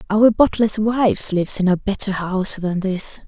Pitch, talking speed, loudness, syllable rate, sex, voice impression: 200 Hz, 185 wpm, -19 LUFS, 4.6 syllables/s, female, feminine, slightly adult-like, slightly dark, calm, slightly unique